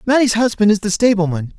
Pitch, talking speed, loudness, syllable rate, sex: 210 Hz, 190 wpm, -15 LUFS, 6.2 syllables/s, male